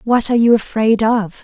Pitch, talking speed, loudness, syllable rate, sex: 220 Hz, 210 wpm, -14 LUFS, 5.3 syllables/s, female